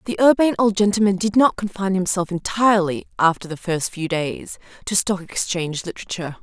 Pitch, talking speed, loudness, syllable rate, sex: 190 Hz, 170 wpm, -20 LUFS, 6.0 syllables/s, female